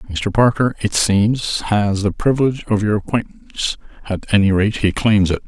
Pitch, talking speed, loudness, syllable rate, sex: 105 Hz, 165 wpm, -17 LUFS, 5.1 syllables/s, male